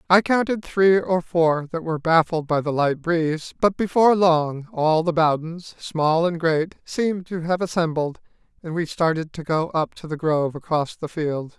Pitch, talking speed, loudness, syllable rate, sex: 165 Hz, 190 wpm, -22 LUFS, 4.7 syllables/s, male